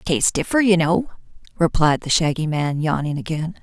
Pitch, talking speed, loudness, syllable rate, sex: 165 Hz, 165 wpm, -20 LUFS, 5.1 syllables/s, female